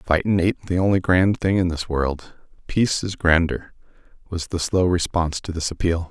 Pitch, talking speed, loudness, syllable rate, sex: 85 Hz, 185 wpm, -21 LUFS, 5.0 syllables/s, male